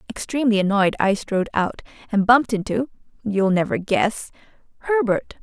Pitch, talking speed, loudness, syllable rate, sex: 220 Hz, 110 wpm, -20 LUFS, 5.4 syllables/s, female